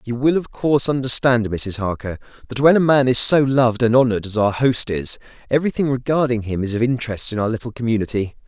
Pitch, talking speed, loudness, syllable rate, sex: 120 Hz, 210 wpm, -18 LUFS, 6.2 syllables/s, male